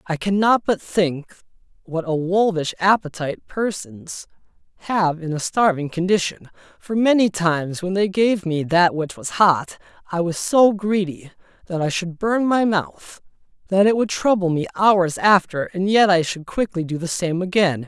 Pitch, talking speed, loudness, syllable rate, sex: 180 Hz, 170 wpm, -20 LUFS, 4.5 syllables/s, male